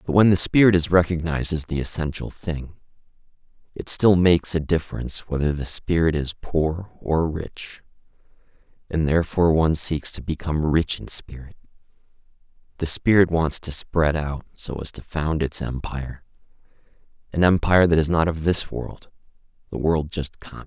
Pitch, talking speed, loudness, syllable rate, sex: 80 Hz, 155 wpm, -22 LUFS, 5.2 syllables/s, male